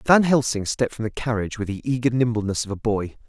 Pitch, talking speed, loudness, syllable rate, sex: 115 Hz, 240 wpm, -23 LUFS, 6.6 syllables/s, male